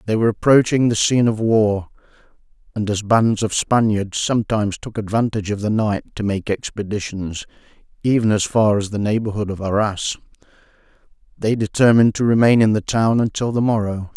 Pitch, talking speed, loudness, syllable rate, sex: 110 Hz, 165 wpm, -18 LUFS, 5.5 syllables/s, male